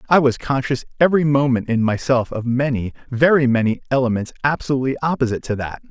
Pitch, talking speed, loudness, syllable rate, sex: 130 Hz, 165 wpm, -19 LUFS, 6.4 syllables/s, male